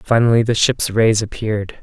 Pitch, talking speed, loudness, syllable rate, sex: 110 Hz, 165 wpm, -16 LUFS, 5.2 syllables/s, male